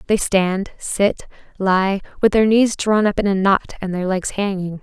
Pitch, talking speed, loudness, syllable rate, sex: 195 Hz, 200 wpm, -18 LUFS, 4.2 syllables/s, female